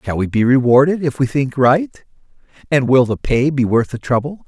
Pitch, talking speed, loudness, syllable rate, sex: 135 Hz, 215 wpm, -15 LUFS, 5.1 syllables/s, male